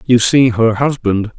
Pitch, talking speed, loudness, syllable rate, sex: 120 Hz, 175 wpm, -13 LUFS, 4.0 syllables/s, male